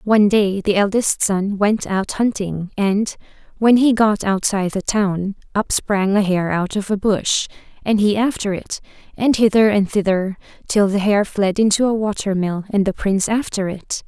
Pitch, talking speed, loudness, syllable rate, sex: 205 Hz, 190 wpm, -18 LUFS, 4.6 syllables/s, female